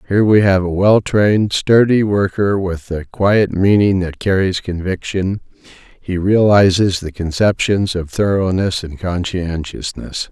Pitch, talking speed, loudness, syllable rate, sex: 95 Hz, 135 wpm, -15 LUFS, 4.2 syllables/s, male